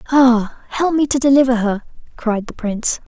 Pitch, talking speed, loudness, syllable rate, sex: 250 Hz, 170 wpm, -17 LUFS, 5.0 syllables/s, female